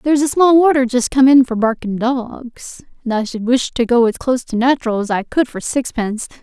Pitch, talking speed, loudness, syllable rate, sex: 250 Hz, 235 wpm, -15 LUFS, 5.3 syllables/s, female